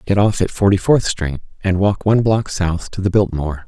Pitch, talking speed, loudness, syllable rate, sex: 95 Hz, 230 wpm, -17 LUFS, 5.4 syllables/s, male